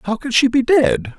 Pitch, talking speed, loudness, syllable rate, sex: 190 Hz, 255 wpm, -15 LUFS, 4.8 syllables/s, male